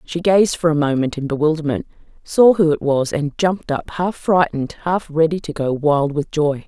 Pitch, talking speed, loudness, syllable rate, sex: 155 Hz, 205 wpm, -18 LUFS, 5.1 syllables/s, female